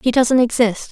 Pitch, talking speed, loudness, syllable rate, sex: 240 Hz, 195 wpm, -16 LUFS, 4.6 syllables/s, female